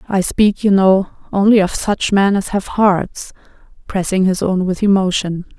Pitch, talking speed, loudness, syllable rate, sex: 195 Hz, 170 wpm, -15 LUFS, 4.4 syllables/s, female